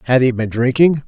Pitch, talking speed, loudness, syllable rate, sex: 130 Hz, 225 wpm, -15 LUFS, 5.6 syllables/s, male